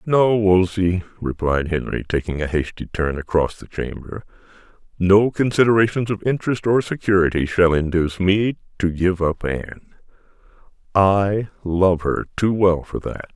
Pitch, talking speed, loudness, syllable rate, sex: 95 Hz, 140 wpm, -20 LUFS, 4.7 syllables/s, male